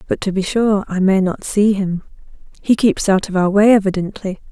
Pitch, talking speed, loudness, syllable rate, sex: 195 Hz, 215 wpm, -16 LUFS, 5.2 syllables/s, female